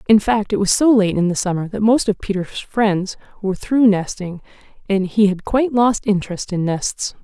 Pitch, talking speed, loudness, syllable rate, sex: 205 Hz, 205 wpm, -18 LUFS, 5.1 syllables/s, female